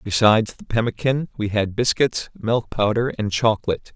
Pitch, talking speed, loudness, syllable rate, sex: 115 Hz, 150 wpm, -21 LUFS, 5.2 syllables/s, male